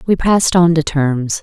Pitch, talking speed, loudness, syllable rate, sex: 160 Hz, 210 wpm, -14 LUFS, 4.7 syllables/s, female